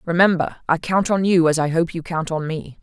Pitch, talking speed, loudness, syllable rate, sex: 170 Hz, 255 wpm, -20 LUFS, 5.4 syllables/s, female